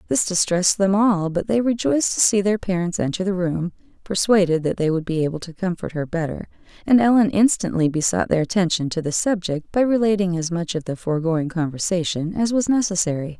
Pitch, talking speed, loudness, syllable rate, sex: 180 Hz, 195 wpm, -20 LUFS, 5.8 syllables/s, female